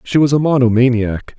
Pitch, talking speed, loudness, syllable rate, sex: 125 Hz, 175 wpm, -14 LUFS, 5.4 syllables/s, male